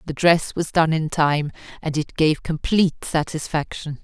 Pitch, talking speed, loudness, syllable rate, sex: 155 Hz, 165 wpm, -21 LUFS, 4.8 syllables/s, female